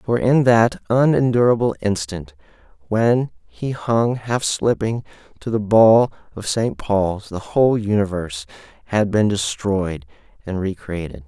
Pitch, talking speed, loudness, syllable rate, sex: 105 Hz, 135 wpm, -19 LUFS, 4.1 syllables/s, male